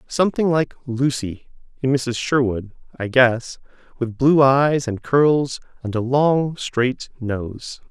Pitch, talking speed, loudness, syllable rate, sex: 130 Hz, 135 wpm, -20 LUFS, 3.5 syllables/s, male